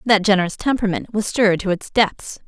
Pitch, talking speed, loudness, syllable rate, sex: 200 Hz, 195 wpm, -19 LUFS, 6.0 syllables/s, female